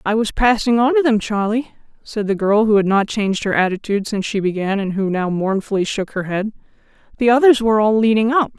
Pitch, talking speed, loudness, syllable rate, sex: 215 Hz, 225 wpm, -17 LUFS, 6.0 syllables/s, female